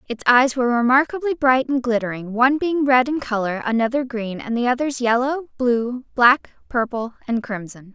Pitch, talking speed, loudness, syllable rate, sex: 250 Hz, 175 wpm, -20 LUFS, 5.1 syllables/s, female